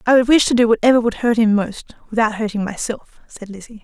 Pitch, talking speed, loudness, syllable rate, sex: 220 Hz, 220 wpm, -17 LUFS, 6.1 syllables/s, female